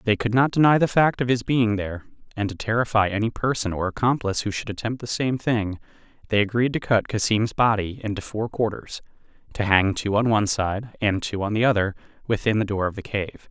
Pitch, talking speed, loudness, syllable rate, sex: 110 Hz, 215 wpm, -23 LUFS, 5.8 syllables/s, male